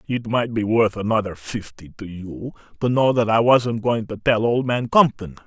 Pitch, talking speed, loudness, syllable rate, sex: 110 Hz, 210 wpm, -20 LUFS, 4.7 syllables/s, male